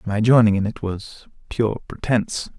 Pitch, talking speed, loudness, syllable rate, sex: 110 Hz, 165 wpm, -20 LUFS, 4.6 syllables/s, male